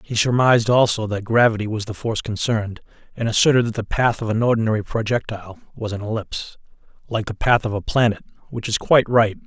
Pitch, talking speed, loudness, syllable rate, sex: 110 Hz, 190 wpm, -20 LUFS, 6.4 syllables/s, male